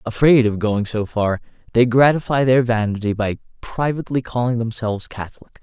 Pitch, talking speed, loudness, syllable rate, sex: 115 Hz, 150 wpm, -19 LUFS, 5.4 syllables/s, male